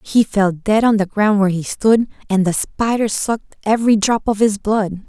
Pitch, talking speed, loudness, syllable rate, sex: 210 Hz, 215 wpm, -17 LUFS, 4.7 syllables/s, female